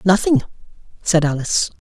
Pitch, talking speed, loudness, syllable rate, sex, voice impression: 185 Hz, 100 wpm, -18 LUFS, 5.7 syllables/s, male, feminine, adult-like, tensed, powerful, slightly muffled, slightly fluent, intellectual, slightly friendly, slightly unique, lively, intense, sharp